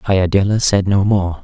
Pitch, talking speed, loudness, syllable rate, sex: 95 Hz, 170 wpm, -15 LUFS, 5.0 syllables/s, male